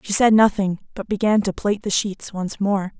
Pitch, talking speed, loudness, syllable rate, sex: 200 Hz, 220 wpm, -20 LUFS, 4.8 syllables/s, female